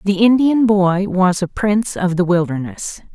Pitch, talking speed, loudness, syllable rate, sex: 195 Hz, 170 wpm, -16 LUFS, 4.4 syllables/s, female